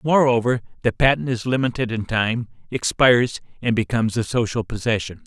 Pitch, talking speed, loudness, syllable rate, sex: 120 Hz, 150 wpm, -21 LUFS, 5.5 syllables/s, male